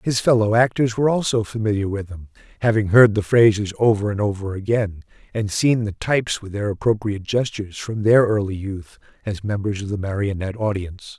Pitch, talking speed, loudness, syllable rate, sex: 105 Hz, 180 wpm, -20 LUFS, 5.7 syllables/s, male